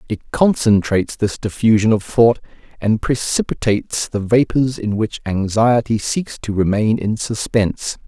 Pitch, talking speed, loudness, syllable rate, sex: 110 Hz, 135 wpm, -17 LUFS, 4.5 syllables/s, male